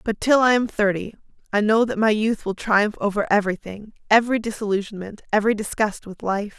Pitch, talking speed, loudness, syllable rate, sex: 210 Hz, 175 wpm, -21 LUFS, 5.8 syllables/s, female